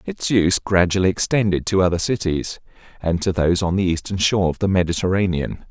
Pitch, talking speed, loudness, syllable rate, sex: 95 Hz, 180 wpm, -19 LUFS, 6.0 syllables/s, male